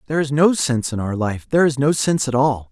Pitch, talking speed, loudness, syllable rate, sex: 135 Hz, 265 wpm, -18 LUFS, 6.8 syllables/s, male